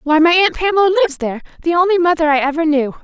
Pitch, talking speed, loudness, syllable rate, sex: 325 Hz, 235 wpm, -14 LUFS, 7.1 syllables/s, female